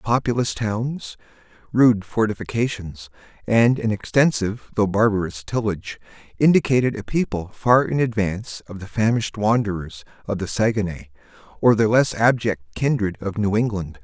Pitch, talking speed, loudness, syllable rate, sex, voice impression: 110 Hz, 130 wpm, -21 LUFS, 5.1 syllables/s, male, very masculine, very adult-like, very thick, tensed, powerful, slightly bright, soft, clear, fluent, slightly raspy, cool, very intellectual, refreshing, sincere, very calm, mature, friendly, reassuring, unique, slightly elegant, wild, slightly sweet, lively, kind, slightly intense